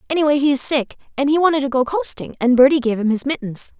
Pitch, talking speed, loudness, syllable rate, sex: 270 Hz, 255 wpm, -17 LUFS, 6.6 syllables/s, female